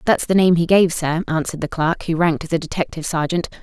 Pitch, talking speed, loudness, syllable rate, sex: 165 Hz, 250 wpm, -19 LUFS, 6.5 syllables/s, female